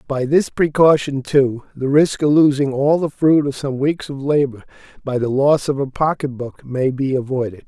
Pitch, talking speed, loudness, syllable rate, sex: 140 Hz, 205 wpm, -17 LUFS, 4.7 syllables/s, male